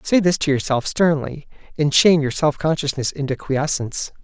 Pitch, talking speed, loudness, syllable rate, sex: 150 Hz, 170 wpm, -19 LUFS, 5.3 syllables/s, male